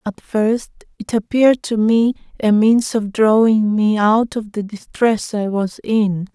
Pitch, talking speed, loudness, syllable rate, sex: 215 Hz, 170 wpm, -17 LUFS, 3.9 syllables/s, female